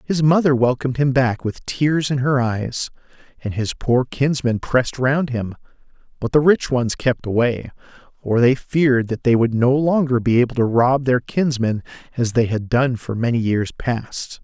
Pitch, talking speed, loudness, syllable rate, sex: 125 Hz, 185 wpm, -19 LUFS, 4.6 syllables/s, male